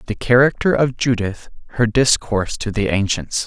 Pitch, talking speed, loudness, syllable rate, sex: 120 Hz, 155 wpm, -18 LUFS, 4.9 syllables/s, male